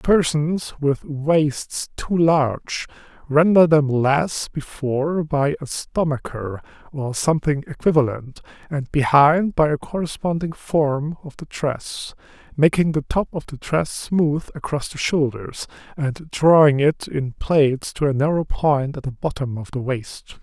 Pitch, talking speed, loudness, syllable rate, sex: 145 Hz, 145 wpm, -20 LUFS, 3.9 syllables/s, male